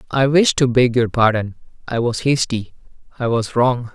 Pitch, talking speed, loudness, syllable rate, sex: 120 Hz, 185 wpm, -17 LUFS, 4.7 syllables/s, male